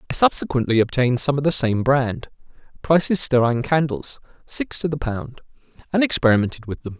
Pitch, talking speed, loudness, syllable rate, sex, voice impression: 130 Hz, 145 wpm, -20 LUFS, 5.8 syllables/s, male, masculine, adult-like, tensed, slightly powerful, bright, clear, fluent, intellectual, friendly, wild, lively, slightly intense